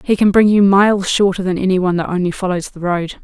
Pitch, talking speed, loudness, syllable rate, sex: 190 Hz, 260 wpm, -15 LUFS, 6.4 syllables/s, female